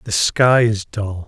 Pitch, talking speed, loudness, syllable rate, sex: 105 Hz, 190 wpm, -17 LUFS, 3.5 syllables/s, male